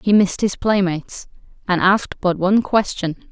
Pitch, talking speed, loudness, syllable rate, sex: 190 Hz, 165 wpm, -18 LUFS, 5.4 syllables/s, female